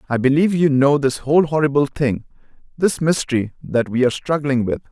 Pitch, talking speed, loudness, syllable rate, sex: 140 Hz, 185 wpm, -18 LUFS, 5.9 syllables/s, male